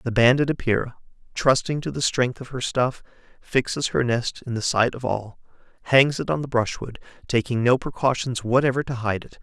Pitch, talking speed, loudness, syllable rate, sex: 125 Hz, 190 wpm, -23 LUFS, 5.2 syllables/s, male